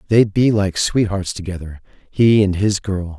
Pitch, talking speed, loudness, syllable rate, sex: 100 Hz, 170 wpm, -17 LUFS, 4.4 syllables/s, male